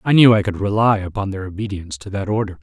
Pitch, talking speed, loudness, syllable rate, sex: 100 Hz, 250 wpm, -19 LUFS, 6.4 syllables/s, male